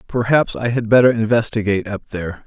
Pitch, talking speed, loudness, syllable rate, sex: 110 Hz, 170 wpm, -17 LUFS, 6.3 syllables/s, male